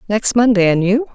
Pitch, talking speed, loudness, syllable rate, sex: 215 Hz, 210 wpm, -14 LUFS, 5.4 syllables/s, female